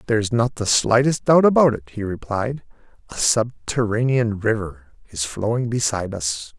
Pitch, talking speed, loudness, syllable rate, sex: 115 Hz, 145 wpm, -20 LUFS, 4.8 syllables/s, male